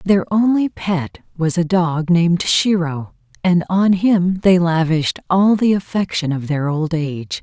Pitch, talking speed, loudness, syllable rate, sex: 175 Hz, 160 wpm, -17 LUFS, 4.2 syllables/s, female